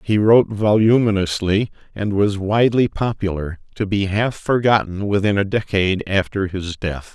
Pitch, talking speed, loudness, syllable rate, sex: 100 Hz, 145 wpm, -18 LUFS, 4.8 syllables/s, male